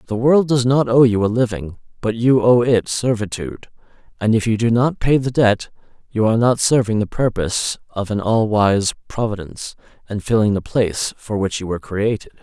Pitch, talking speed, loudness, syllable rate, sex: 110 Hz, 200 wpm, -18 LUFS, 5.4 syllables/s, male